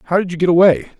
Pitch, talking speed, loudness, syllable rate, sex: 175 Hz, 300 wpm, -14 LUFS, 8.2 syllables/s, male